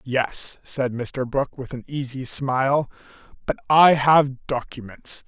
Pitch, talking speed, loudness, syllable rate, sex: 130 Hz, 135 wpm, -22 LUFS, 3.9 syllables/s, male